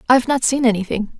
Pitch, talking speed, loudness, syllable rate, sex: 240 Hz, 200 wpm, -17 LUFS, 7.1 syllables/s, female